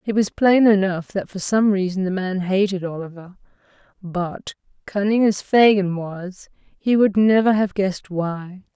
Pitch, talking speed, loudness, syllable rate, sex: 195 Hz, 160 wpm, -19 LUFS, 4.3 syllables/s, female